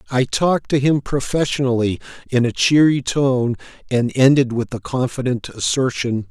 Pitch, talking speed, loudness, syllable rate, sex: 130 Hz, 145 wpm, -18 LUFS, 4.8 syllables/s, male